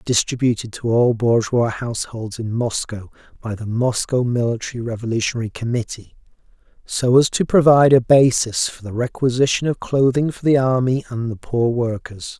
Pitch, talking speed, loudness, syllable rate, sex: 120 Hz, 150 wpm, -19 LUFS, 5.2 syllables/s, male